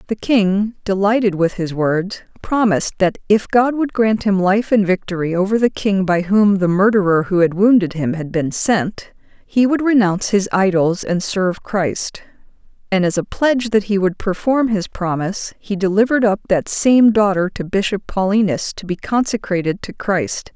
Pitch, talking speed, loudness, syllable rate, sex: 200 Hz, 180 wpm, -17 LUFS, 4.8 syllables/s, female